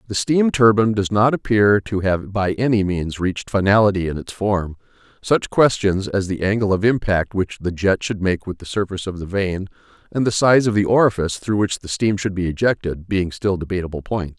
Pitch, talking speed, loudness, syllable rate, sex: 100 Hz, 215 wpm, -19 LUFS, 5.4 syllables/s, male